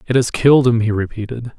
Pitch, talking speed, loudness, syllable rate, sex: 115 Hz, 225 wpm, -16 LUFS, 6.3 syllables/s, male